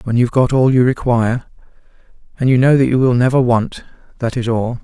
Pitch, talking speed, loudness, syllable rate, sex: 125 Hz, 210 wpm, -15 LUFS, 6.0 syllables/s, male